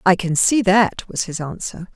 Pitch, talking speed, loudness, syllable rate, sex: 190 Hz, 215 wpm, -18 LUFS, 4.4 syllables/s, female